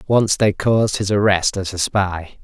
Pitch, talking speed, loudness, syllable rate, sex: 100 Hz, 195 wpm, -18 LUFS, 4.4 syllables/s, male